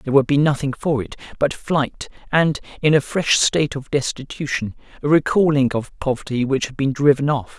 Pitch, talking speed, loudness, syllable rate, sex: 140 Hz, 190 wpm, -19 LUFS, 5.3 syllables/s, male